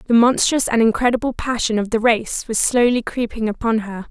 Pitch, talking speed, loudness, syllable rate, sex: 230 Hz, 190 wpm, -18 LUFS, 5.4 syllables/s, female